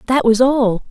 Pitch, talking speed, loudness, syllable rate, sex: 240 Hz, 200 wpm, -14 LUFS, 4.3 syllables/s, female